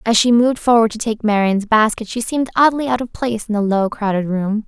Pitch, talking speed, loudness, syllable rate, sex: 225 Hz, 245 wpm, -17 LUFS, 6.0 syllables/s, female